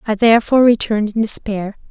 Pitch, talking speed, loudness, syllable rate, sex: 220 Hz, 160 wpm, -15 LUFS, 6.6 syllables/s, female